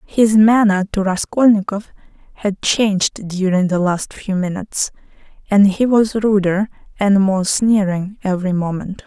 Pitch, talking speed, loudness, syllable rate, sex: 200 Hz, 130 wpm, -16 LUFS, 4.5 syllables/s, female